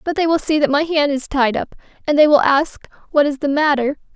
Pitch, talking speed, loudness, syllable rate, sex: 290 Hz, 260 wpm, -17 LUFS, 5.8 syllables/s, female